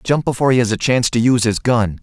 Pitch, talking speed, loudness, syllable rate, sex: 120 Hz, 295 wpm, -16 LUFS, 7.0 syllables/s, male